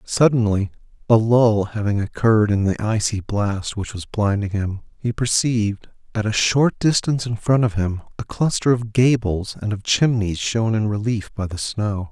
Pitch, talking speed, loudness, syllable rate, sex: 110 Hz, 180 wpm, -20 LUFS, 4.6 syllables/s, male